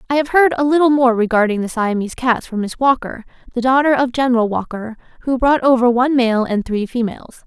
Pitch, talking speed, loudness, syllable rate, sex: 245 Hz, 210 wpm, -16 LUFS, 6.1 syllables/s, female